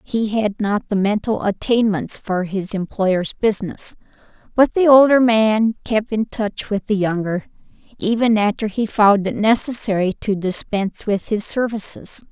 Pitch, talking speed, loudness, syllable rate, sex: 210 Hz, 150 wpm, -18 LUFS, 4.4 syllables/s, female